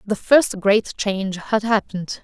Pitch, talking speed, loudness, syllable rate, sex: 205 Hz, 160 wpm, -19 LUFS, 4.4 syllables/s, female